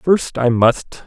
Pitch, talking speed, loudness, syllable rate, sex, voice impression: 135 Hz, 170 wpm, -15 LUFS, 2.9 syllables/s, male, masculine, middle-aged, slightly relaxed, slightly powerful, bright, soft, muffled, friendly, reassuring, wild, lively, kind, slightly modest